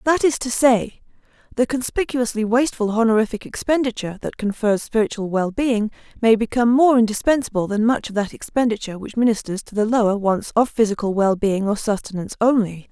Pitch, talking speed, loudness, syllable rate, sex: 225 Hz, 160 wpm, -20 LUFS, 5.9 syllables/s, female